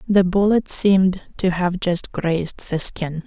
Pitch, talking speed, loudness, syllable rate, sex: 180 Hz, 165 wpm, -19 LUFS, 4.1 syllables/s, female